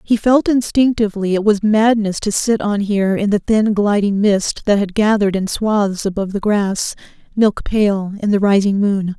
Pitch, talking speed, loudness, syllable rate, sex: 205 Hz, 190 wpm, -16 LUFS, 4.9 syllables/s, female